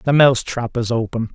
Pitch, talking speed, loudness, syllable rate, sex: 120 Hz, 225 wpm, -18 LUFS, 5.4 syllables/s, male